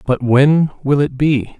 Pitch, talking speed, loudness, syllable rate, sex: 140 Hz, 190 wpm, -14 LUFS, 3.6 syllables/s, male